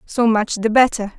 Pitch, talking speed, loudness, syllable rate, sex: 220 Hz, 200 wpm, -17 LUFS, 4.7 syllables/s, female